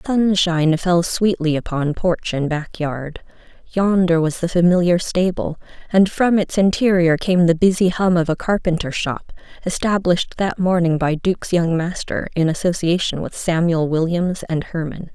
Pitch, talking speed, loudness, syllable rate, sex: 175 Hz, 150 wpm, -18 LUFS, 4.6 syllables/s, female